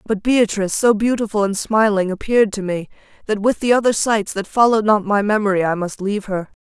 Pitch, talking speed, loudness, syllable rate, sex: 210 Hz, 210 wpm, -18 LUFS, 6.0 syllables/s, female